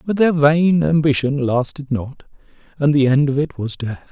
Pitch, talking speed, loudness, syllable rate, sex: 145 Hz, 190 wpm, -17 LUFS, 4.6 syllables/s, male